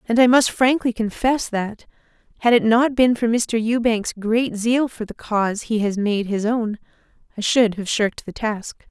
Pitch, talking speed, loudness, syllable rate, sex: 225 Hz, 195 wpm, -20 LUFS, 4.5 syllables/s, female